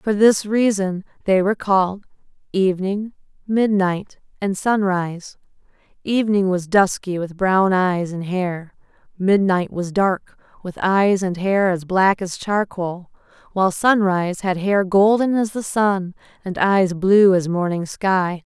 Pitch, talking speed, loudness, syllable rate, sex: 190 Hz, 140 wpm, -19 LUFS, 4.1 syllables/s, female